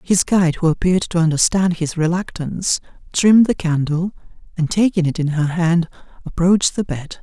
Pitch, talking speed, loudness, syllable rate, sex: 170 Hz, 165 wpm, -18 LUFS, 5.6 syllables/s, male